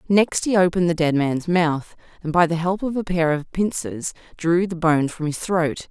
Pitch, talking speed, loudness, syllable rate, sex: 170 Hz, 225 wpm, -21 LUFS, 4.8 syllables/s, female